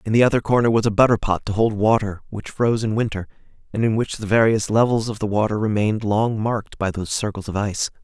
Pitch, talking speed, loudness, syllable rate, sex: 110 Hz, 240 wpm, -20 LUFS, 6.4 syllables/s, male